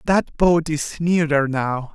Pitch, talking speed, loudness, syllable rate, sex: 155 Hz, 155 wpm, -20 LUFS, 3.4 syllables/s, male